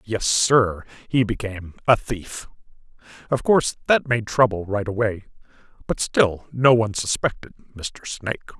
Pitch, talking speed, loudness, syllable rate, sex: 110 Hz, 140 wpm, -21 LUFS, 4.7 syllables/s, male